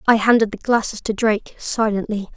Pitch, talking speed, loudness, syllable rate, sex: 215 Hz, 180 wpm, -19 LUFS, 5.6 syllables/s, female